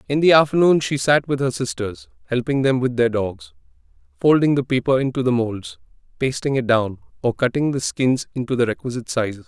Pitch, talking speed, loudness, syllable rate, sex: 130 Hz, 190 wpm, -20 LUFS, 5.6 syllables/s, male